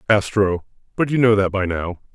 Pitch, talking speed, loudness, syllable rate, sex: 100 Hz, 195 wpm, -19 LUFS, 5.1 syllables/s, male